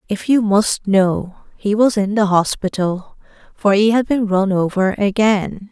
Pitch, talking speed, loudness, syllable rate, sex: 205 Hz, 170 wpm, -16 LUFS, 4.0 syllables/s, female